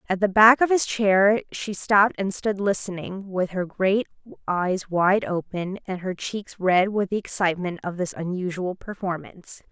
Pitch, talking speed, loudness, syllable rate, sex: 190 Hz, 165 wpm, -23 LUFS, 4.4 syllables/s, female